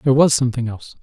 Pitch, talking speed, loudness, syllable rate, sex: 125 Hz, 235 wpm, -18 LUFS, 8.9 syllables/s, male